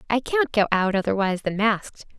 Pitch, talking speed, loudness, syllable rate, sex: 215 Hz, 190 wpm, -22 LUFS, 6.0 syllables/s, female